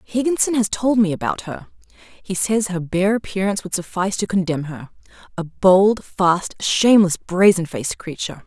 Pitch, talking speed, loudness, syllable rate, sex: 190 Hz, 155 wpm, -19 LUFS, 5.1 syllables/s, female